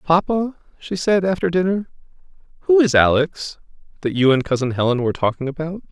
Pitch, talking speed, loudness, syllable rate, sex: 160 Hz, 160 wpm, -19 LUFS, 5.8 syllables/s, male